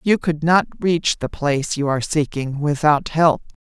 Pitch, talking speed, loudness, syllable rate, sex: 150 Hz, 180 wpm, -19 LUFS, 4.6 syllables/s, female